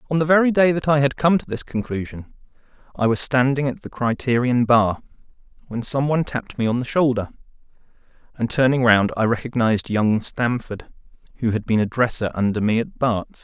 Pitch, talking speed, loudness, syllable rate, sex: 125 Hz, 190 wpm, -20 LUFS, 5.7 syllables/s, male